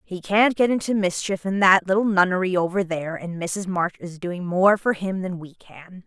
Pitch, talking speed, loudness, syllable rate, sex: 185 Hz, 220 wpm, -22 LUFS, 4.9 syllables/s, female